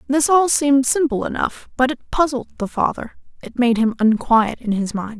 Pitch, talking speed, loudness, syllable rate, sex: 250 Hz, 195 wpm, -18 LUFS, 5.0 syllables/s, female